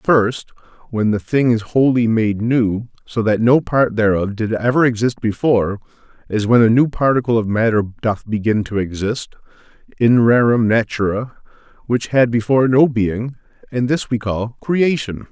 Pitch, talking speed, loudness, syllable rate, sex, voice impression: 115 Hz, 160 wpm, -17 LUFS, 4.6 syllables/s, male, very masculine, slightly old, very thick, tensed, very powerful, bright, soft, muffled, fluent, very cool, intellectual, slightly refreshing, very sincere, very calm, very mature, friendly, very reassuring, unique, elegant, wild, slightly sweet, lively, kind, slightly intense